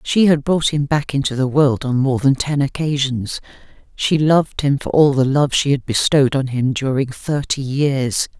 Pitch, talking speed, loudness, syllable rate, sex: 140 Hz, 200 wpm, -17 LUFS, 4.7 syllables/s, female